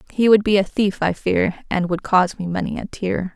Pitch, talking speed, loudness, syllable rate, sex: 195 Hz, 250 wpm, -19 LUFS, 5.4 syllables/s, female